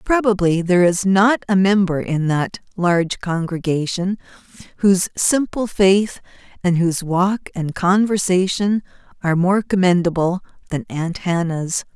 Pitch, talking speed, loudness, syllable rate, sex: 185 Hz, 120 wpm, -18 LUFS, 4.4 syllables/s, female